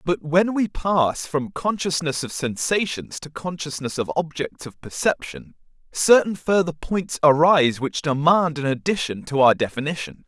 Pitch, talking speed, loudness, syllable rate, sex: 160 Hz, 145 wpm, -21 LUFS, 4.5 syllables/s, male